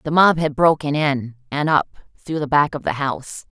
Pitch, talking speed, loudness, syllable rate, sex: 145 Hz, 215 wpm, -19 LUFS, 5.2 syllables/s, female